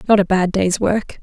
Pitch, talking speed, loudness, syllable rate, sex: 195 Hz, 245 wpm, -17 LUFS, 4.7 syllables/s, female